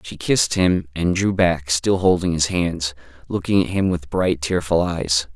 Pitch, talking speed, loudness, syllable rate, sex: 85 Hz, 190 wpm, -20 LUFS, 4.4 syllables/s, male